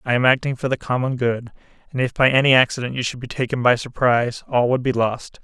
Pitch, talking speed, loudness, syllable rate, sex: 125 Hz, 245 wpm, -19 LUFS, 6.2 syllables/s, male